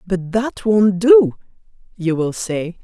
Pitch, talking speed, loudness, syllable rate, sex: 195 Hz, 150 wpm, -16 LUFS, 3.3 syllables/s, female